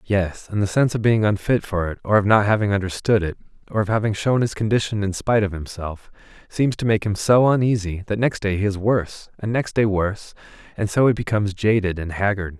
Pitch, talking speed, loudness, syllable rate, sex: 105 Hz, 230 wpm, -21 LUFS, 5.9 syllables/s, male